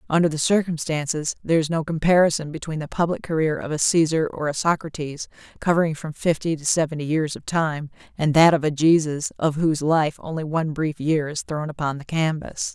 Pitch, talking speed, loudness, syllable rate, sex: 155 Hz, 200 wpm, -22 LUFS, 5.7 syllables/s, female